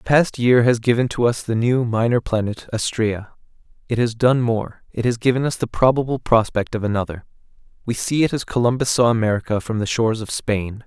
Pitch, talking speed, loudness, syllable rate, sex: 115 Hz, 200 wpm, -20 LUFS, 5.7 syllables/s, male